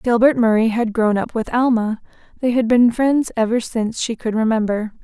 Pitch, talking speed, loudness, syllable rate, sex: 230 Hz, 190 wpm, -18 LUFS, 5.1 syllables/s, female